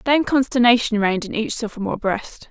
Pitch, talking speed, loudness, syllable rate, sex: 230 Hz, 170 wpm, -19 LUFS, 5.9 syllables/s, female